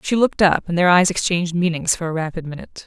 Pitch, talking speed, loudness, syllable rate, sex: 175 Hz, 250 wpm, -18 LUFS, 6.9 syllables/s, female